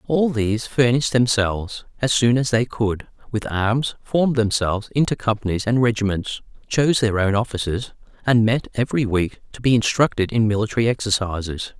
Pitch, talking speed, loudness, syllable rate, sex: 115 Hz, 160 wpm, -20 LUFS, 5.5 syllables/s, male